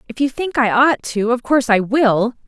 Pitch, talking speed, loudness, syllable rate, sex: 245 Hz, 245 wpm, -16 LUFS, 5.1 syllables/s, female